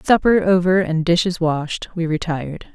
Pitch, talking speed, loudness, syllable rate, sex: 175 Hz, 155 wpm, -18 LUFS, 4.7 syllables/s, female